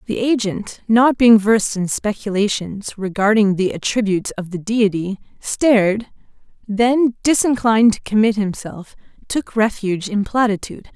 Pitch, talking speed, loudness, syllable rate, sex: 215 Hz, 125 wpm, -17 LUFS, 4.7 syllables/s, female